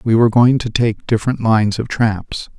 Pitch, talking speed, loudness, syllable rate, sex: 115 Hz, 210 wpm, -16 LUFS, 5.4 syllables/s, male